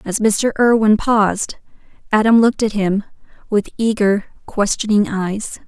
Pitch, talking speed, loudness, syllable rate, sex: 210 Hz, 125 wpm, -17 LUFS, 4.6 syllables/s, female